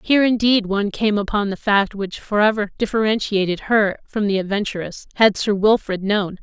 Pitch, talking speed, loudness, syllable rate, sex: 205 Hz, 170 wpm, -19 LUFS, 5.3 syllables/s, female